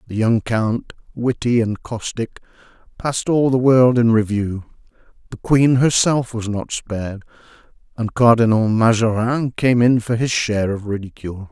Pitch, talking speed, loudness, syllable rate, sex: 115 Hz, 145 wpm, -18 LUFS, 4.6 syllables/s, male